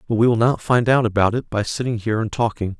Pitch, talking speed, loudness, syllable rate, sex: 115 Hz, 280 wpm, -19 LUFS, 6.5 syllables/s, male